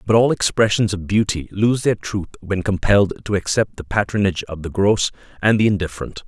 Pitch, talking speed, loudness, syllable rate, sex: 100 Hz, 190 wpm, -19 LUFS, 5.8 syllables/s, male